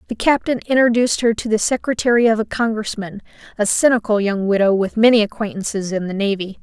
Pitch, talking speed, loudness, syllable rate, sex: 215 Hz, 180 wpm, -17 LUFS, 6.2 syllables/s, female